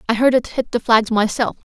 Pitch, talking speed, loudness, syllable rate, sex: 235 Hz, 245 wpm, -17 LUFS, 5.7 syllables/s, female